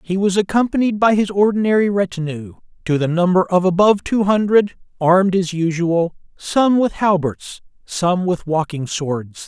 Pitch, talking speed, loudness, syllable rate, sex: 185 Hz, 150 wpm, -17 LUFS, 4.7 syllables/s, male